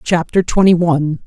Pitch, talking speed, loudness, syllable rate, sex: 170 Hz, 140 wpm, -14 LUFS, 5.2 syllables/s, female